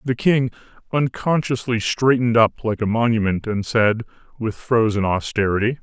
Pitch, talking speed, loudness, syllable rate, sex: 115 Hz, 135 wpm, -20 LUFS, 4.9 syllables/s, male